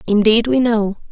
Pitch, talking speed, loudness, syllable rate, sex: 225 Hz, 160 wpm, -15 LUFS, 4.4 syllables/s, female